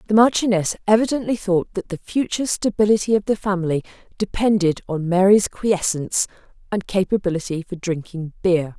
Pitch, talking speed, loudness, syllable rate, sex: 195 Hz, 135 wpm, -20 LUFS, 5.6 syllables/s, female